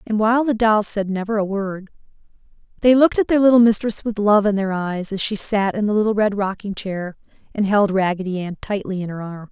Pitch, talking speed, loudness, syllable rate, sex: 205 Hz, 225 wpm, -19 LUFS, 5.7 syllables/s, female